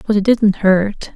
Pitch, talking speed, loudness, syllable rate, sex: 205 Hz, 205 wpm, -15 LUFS, 4.0 syllables/s, female